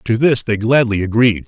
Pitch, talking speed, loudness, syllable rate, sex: 115 Hz, 205 wpm, -15 LUFS, 4.9 syllables/s, male